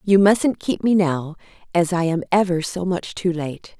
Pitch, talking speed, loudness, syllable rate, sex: 180 Hz, 205 wpm, -20 LUFS, 4.4 syllables/s, female